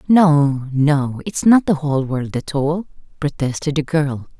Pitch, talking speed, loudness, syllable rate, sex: 150 Hz, 165 wpm, -18 LUFS, 4.0 syllables/s, female